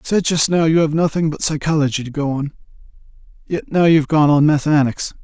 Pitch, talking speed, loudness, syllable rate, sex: 155 Hz, 205 wpm, -16 LUFS, 6.4 syllables/s, male